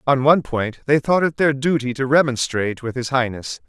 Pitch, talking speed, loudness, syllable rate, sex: 135 Hz, 210 wpm, -19 LUFS, 5.5 syllables/s, male